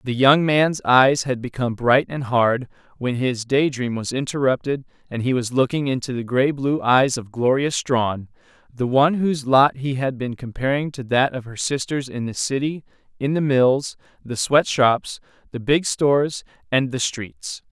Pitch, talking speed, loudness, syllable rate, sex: 130 Hz, 180 wpm, -20 LUFS, 4.6 syllables/s, male